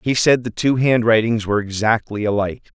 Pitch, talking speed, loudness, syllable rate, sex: 110 Hz, 170 wpm, -18 LUFS, 5.9 syllables/s, male